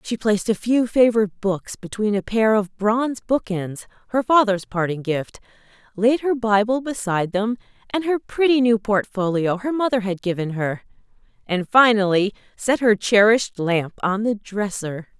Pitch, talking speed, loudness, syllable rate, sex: 215 Hz, 160 wpm, -20 LUFS, 4.9 syllables/s, female